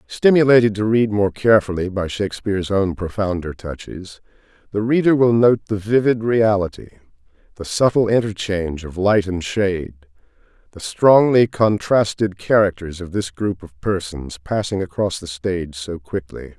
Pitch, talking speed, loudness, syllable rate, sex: 100 Hz, 140 wpm, -18 LUFS, 4.9 syllables/s, male